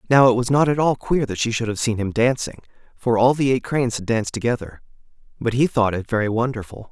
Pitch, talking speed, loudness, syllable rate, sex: 120 Hz, 245 wpm, -20 LUFS, 6.2 syllables/s, male